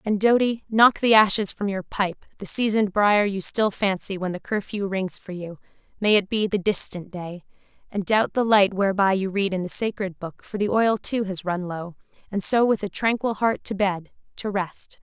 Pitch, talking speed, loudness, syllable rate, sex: 200 Hz, 215 wpm, -22 LUFS, 4.6 syllables/s, female